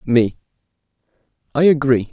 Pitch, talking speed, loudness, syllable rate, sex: 125 Hz, 85 wpm, -17 LUFS, 4.9 syllables/s, male